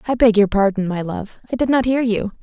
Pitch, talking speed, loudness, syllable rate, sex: 220 Hz, 270 wpm, -18 LUFS, 5.9 syllables/s, female